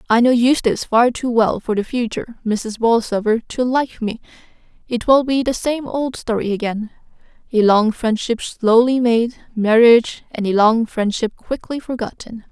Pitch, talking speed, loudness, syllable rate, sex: 230 Hz, 155 wpm, -17 LUFS, 4.7 syllables/s, female